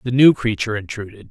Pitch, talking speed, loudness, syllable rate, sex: 110 Hz, 185 wpm, -17 LUFS, 6.6 syllables/s, male